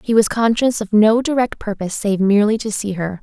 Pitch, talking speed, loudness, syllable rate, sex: 215 Hz, 225 wpm, -17 LUFS, 5.8 syllables/s, female